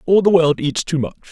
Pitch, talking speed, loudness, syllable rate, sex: 160 Hz, 275 wpm, -17 LUFS, 5.9 syllables/s, male